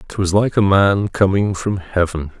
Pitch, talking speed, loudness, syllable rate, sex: 95 Hz, 200 wpm, -17 LUFS, 4.6 syllables/s, male